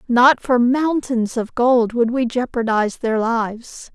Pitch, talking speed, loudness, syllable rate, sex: 240 Hz, 150 wpm, -18 LUFS, 4.0 syllables/s, female